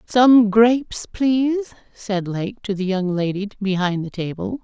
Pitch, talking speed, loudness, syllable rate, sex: 210 Hz, 155 wpm, -19 LUFS, 4.1 syllables/s, female